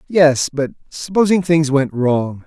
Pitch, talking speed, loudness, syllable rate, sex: 150 Hz, 145 wpm, -16 LUFS, 3.8 syllables/s, male